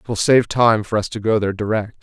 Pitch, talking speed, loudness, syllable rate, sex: 110 Hz, 295 wpm, -18 LUFS, 6.2 syllables/s, male